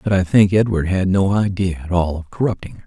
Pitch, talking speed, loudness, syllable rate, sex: 95 Hz, 250 wpm, -18 LUFS, 5.7 syllables/s, male